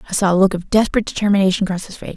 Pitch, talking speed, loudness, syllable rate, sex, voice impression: 195 Hz, 280 wpm, -17 LUFS, 8.8 syllables/s, female, feminine, young, tensed, powerful, bright, soft, slightly raspy, calm, friendly, elegant, lively